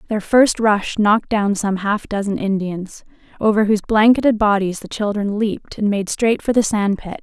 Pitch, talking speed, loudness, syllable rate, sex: 210 Hz, 190 wpm, -18 LUFS, 5.0 syllables/s, female